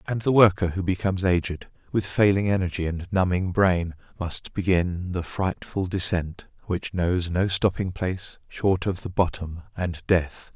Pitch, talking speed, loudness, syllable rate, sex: 90 Hz, 160 wpm, -24 LUFS, 4.4 syllables/s, male